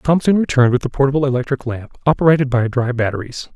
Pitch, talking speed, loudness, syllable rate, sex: 130 Hz, 200 wpm, -17 LUFS, 6.7 syllables/s, male